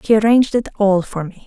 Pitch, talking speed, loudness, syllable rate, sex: 210 Hz, 245 wpm, -16 LUFS, 6.2 syllables/s, female